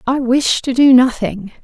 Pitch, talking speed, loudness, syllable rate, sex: 250 Hz, 185 wpm, -13 LUFS, 4.3 syllables/s, female